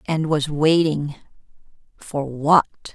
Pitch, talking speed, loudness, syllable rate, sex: 150 Hz, 80 wpm, -20 LUFS, 3.3 syllables/s, female